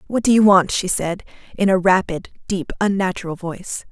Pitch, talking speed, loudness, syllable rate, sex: 190 Hz, 185 wpm, -18 LUFS, 5.4 syllables/s, female